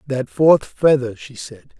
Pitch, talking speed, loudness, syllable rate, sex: 135 Hz, 165 wpm, -16 LUFS, 3.7 syllables/s, male